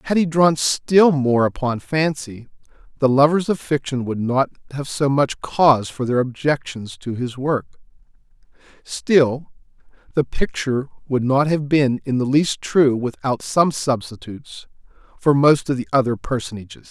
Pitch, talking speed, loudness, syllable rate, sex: 135 Hz, 155 wpm, -19 LUFS, 4.4 syllables/s, male